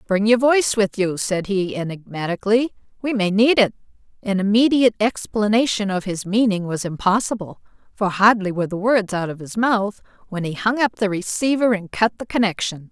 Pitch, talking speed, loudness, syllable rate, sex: 205 Hz, 180 wpm, -20 LUFS, 5.4 syllables/s, female